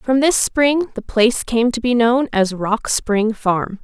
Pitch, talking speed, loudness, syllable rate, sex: 235 Hz, 205 wpm, -17 LUFS, 3.8 syllables/s, female